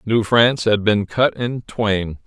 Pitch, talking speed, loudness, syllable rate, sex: 110 Hz, 185 wpm, -18 LUFS, 3.8 syllables/s, male